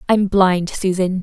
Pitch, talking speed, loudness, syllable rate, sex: 190 Hz, 145 wpm, -17 LUFS, 3.8 syllables/s, female